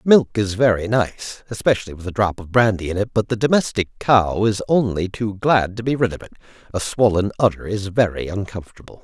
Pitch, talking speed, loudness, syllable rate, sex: 105 Hz, 205 wpm, -20 LUFS, 5.6 syllables/s, male